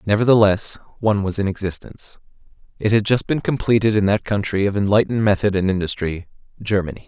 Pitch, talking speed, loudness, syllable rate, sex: 105 Hz, 155 wpm, -19 LUFS, 6.4 syllables/s, male